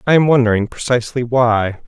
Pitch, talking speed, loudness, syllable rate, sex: 120 Hz, 160 wpm, -15 LUFS, 5.9 syllables/s, male